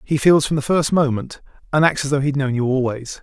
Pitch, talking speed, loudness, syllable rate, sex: 140 Hz, 280 wpm, -18 LUFS, 6.0 syllables/s, male